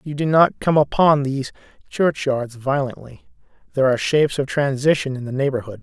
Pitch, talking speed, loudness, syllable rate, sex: 140 Hz, 165 wpm, -19 LUFS, 5.7 syllables/s, male